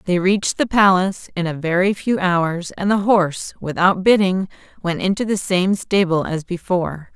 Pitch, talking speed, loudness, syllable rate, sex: 185 Hz, 175 wpm, -18 LUFS, 4.9 syllables/s, female